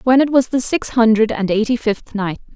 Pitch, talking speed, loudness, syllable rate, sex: 230 Hz, 235 wpm, -17 LUFS, 5.2 syllables/s, female